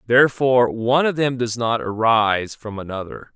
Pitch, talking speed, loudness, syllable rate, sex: 120 Hz, 160 wpm, -19 LUFS, 5.2 syllables/s, male